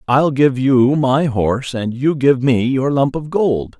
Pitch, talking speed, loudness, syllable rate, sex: 130 Hz, 205 wpm, -16 LUFS, 3.9 syllables/s, male